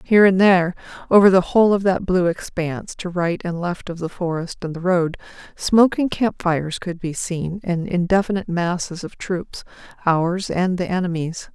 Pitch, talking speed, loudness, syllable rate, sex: 180 Hz, 170 wpm, -20 LUFS, 5.0 syllables/s, female